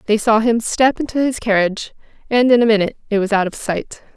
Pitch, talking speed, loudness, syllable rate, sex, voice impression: 225 Hz, 230 wpm, -16 LUFS, 6.1 syllables/s, female, very feminine, young, very thin, slightly tensed, slightly weak, very bright, slightly soft, very clear, very fluent, slightly raspy, very cute, intellectual, very refreshing, sincere, calm, very friendly, very reassuring, very unique, very elegant, slightly wild, very sweet, very lively, kind, slightly intense, slightly sharp, light